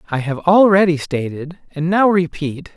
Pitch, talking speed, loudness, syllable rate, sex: 165 Hz, 150 wpm, -16 LUFS, 4.5 syllables/s, male